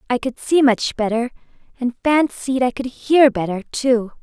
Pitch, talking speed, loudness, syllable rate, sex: 250 Hz, 170 wpm, -18 LUFS, 4.5 syllables/s, female